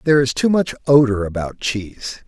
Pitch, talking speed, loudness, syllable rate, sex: 125 Hz, 185 wpm, -18 LUFS, 5.5 syllables/s, male